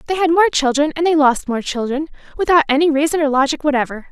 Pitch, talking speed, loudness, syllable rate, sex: 290 Hz, 205 wpm, -16 LUFS, 6.5 syllables/s, female